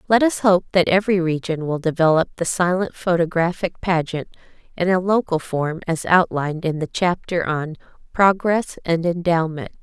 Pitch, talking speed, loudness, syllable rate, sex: 175 Hz, 155 wpm, -20 LUFS, 5.0 syllables/s, female